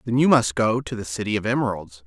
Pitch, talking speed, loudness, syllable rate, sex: 110 Hz, 260 wpm, -22 LUFS, 6.2 syllables/s, male